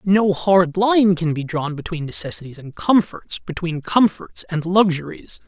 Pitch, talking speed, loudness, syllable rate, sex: 175 Hz, 155 wpm, -19 LUFS, 4.4 syllables/s, male